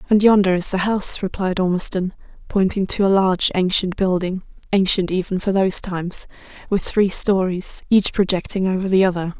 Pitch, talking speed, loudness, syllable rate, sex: 190 Hz, 155 wpm, -19 LUFS, 5.5 syllables/s, female